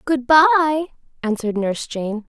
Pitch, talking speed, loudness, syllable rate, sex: 260 Hz, 125 wpm, -18 LUFS, 5.8 syllables/s, female